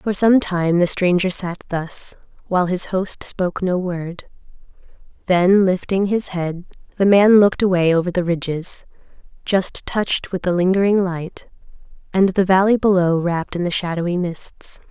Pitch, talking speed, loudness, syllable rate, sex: 185 Hz, 155 wpm, -18 LUFS, 4.6 syllables/s, female